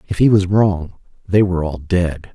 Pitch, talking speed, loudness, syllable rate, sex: 90 Hz, 205 wpm, -17 LUFS, 5.0 syllables/s, male